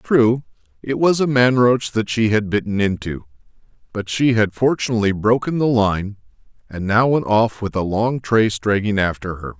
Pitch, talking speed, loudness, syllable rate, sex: 110 Hz, 180 wpm, -18 LUFS, 4.9 syllables/s, male